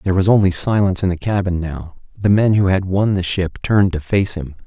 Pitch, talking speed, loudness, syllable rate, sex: 95 Hz, 245 wpm, -17 LUFS, 6.0 syllables/s, male